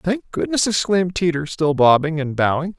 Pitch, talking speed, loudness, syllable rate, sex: 170 Hz, 170 wpm, -19 LUFS, 5.2 syllables/s, male